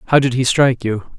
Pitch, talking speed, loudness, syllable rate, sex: 125 Hz, 255 wpm, -16 LUFS, 6.7 syllables/s, male